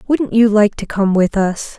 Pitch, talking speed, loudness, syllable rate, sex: 210 Hz, 235 wpm, -15 LUFS, 4.2 syllables/s, female